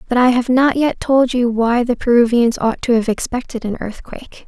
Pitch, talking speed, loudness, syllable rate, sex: 240 Hz, 215 wpm, -16 LUFS, 5.2 syllables/s, female